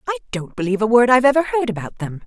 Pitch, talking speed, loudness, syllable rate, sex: 225 Hz, 265 wpm, -17 LUFS, 7.8 syllables/s, female